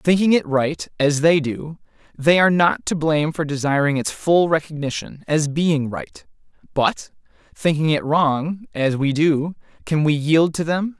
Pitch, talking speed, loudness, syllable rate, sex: 155 Hz, 170 wpm, -19 LUFS, 4.3 syllables/s, male